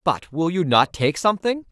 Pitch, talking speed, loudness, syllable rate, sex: 170 Hz, 210 wpm, -20 LUFS, 5.0 syllables/s, male